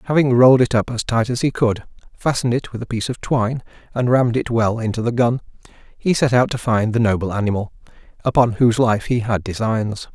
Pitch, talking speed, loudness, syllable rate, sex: 115 Hz, 220 wpm, -19 LUFS, 6.1 syllables/s, male